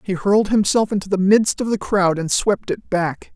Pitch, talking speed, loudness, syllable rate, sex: 195 Hz, 235 wpm, -18 LUFS, 4.9 syllables/s, female